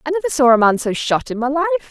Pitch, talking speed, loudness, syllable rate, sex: 285 Hz, 315 wpm, -16 LUFS, 7.1 syllables/s, female